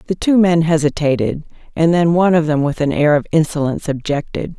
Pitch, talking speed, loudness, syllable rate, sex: 160 Hz, 195 wpm, -16 LUFS, 5.9 syllables/s, female